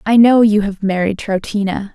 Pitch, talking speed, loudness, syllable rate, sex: 205 Hz, 185 wpm, -15 LUFS, 4.9 syllables/s, female